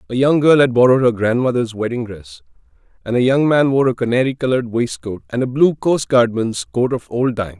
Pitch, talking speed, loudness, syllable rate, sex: 125 Hz, 205 wpm, -16 LUFS, 5.7 syllables/s, male